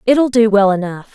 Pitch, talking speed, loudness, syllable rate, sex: 215 Hz, 210 wpm, -13 LUFS, 4.6 syllables/s, female